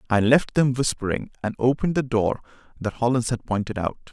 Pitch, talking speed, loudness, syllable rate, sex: 120 Hz, 190 wpm, -23 LUFS, 5.8 syllables/s, male